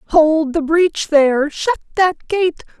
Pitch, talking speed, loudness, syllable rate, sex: 320 Hz, 150 wpm, -16 LUFS, 3.6 syllables/s, female